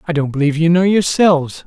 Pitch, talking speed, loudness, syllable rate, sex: 165 Hz, 215 wpm, -14 LUFS, 6.4 syllables/s, male